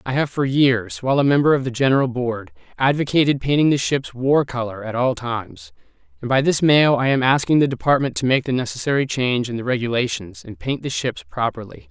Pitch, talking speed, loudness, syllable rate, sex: 130 Hz, 210 wpm, -19 LUFS, 5.8 syllables/s, male